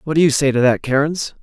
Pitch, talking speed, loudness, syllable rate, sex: 145 Hz, 295 wpm, -16 LUFS, 6.4 syllables/s, male